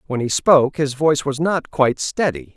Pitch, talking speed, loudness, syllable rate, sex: 140 Hz, 210 wpm, -18 LUFS, 5.4 syllables/s, male